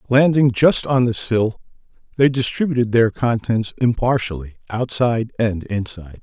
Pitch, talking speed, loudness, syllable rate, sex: 115 Hz, 125 wpm, -19 LUFS, 4.8 syllables/s, male